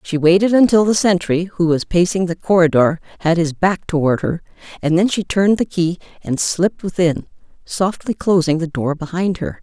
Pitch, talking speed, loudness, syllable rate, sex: 175 Hz, 185 wpm, -17 LUFS, 5.2 syllables/s, female